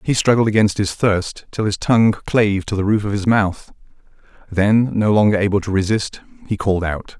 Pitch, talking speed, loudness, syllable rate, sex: 100 Hz, 200 wpm, -17 LUFS, 5.4 syllables/s, male